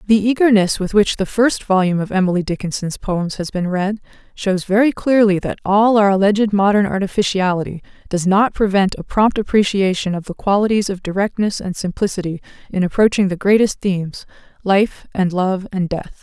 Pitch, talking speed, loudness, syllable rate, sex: 195 Hz, 165 wpm, -17 LUFS, 5.6 syllables/s, female